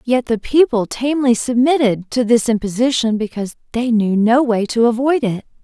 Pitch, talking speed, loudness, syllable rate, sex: 235 Hz, 170 wpm, -16 LUFS, 5.2 syllables/s, female